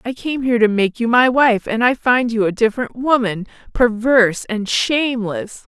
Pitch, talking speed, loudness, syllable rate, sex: 230 Hz, 190 wpm, -16 LUFS, 4.9 syllables/s, female